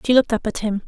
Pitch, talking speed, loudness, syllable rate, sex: 225 Hz, 340 wpm, -20 LUFS, 8.3 syllables/s, female